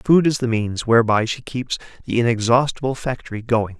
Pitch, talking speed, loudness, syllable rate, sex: 120 Hz, 175 wpm, -20 LUFS, 5.6 syllables/s, male